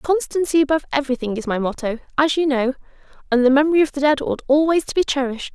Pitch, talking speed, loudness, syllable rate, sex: 280 Hz, 215 wpm, -19 LUFS, 7.1 syllables/s, female